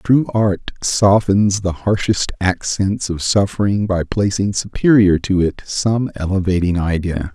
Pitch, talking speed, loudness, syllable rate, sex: 100 Hz, 130 wpm, -17 LUFS, 4.0 syllables/s, male